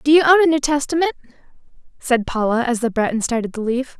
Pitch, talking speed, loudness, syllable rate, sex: 265 Hz, 210 wpm, -18 LUFS, 6.6 syllables/s, female